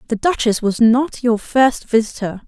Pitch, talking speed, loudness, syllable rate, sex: 235 Hz, 170 wpm, -16 LUFS, 4.4 syllables/s, female